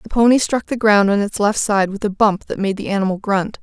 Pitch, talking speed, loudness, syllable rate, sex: 205 Hz, 280 wpm, -17 LUFS, 5.7 syllables/s, female